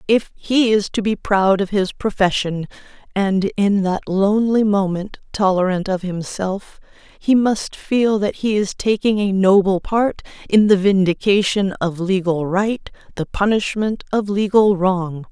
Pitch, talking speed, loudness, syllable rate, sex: 200 Hz, 150 wpm, -18 LUFS, 4.1 syllables/s, female